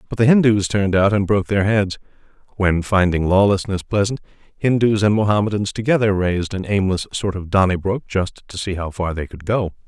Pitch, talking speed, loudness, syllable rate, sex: 100 Hz, 190 wpm, -19 LUFS, 5.7 syllables/s, male